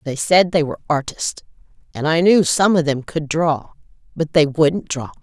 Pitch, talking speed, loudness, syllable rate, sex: 155 Hz, 185 wpm, -18 LUFS, 4.9 syllables/s, female